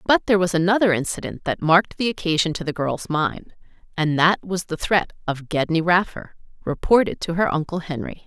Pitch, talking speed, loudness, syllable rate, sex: 170 Hz, 190 wpm, -21 LUFS, 5.4 syllables/s, female